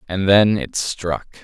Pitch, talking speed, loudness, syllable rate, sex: 95 Hz, 125 wpm, -18 LUFS, 3.6 syllables/s, male